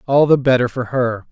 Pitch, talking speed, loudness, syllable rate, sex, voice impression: 125 Hz, 230 wpm, -16 LUFS, 5.3 syllables/s, male, very masculine, very adult-like, middle-aged, very thick, tensed, powerful, bright, hard, very clear, fluent, cool, intellectual, refreshing, sincere, calm, very friendly, very reassuring, slightly unique, elegant, slightly wild, sweet, slightly lively, very kind, very modest